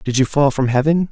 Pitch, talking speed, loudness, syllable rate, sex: 140 Hz, 270 wpm, -16 LUFS, 5.6 syllables/s, male